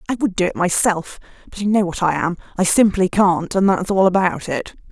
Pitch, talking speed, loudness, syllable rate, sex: 185 Hz, 230 wpm, -18 LUFS, 5.4 syllables/s, female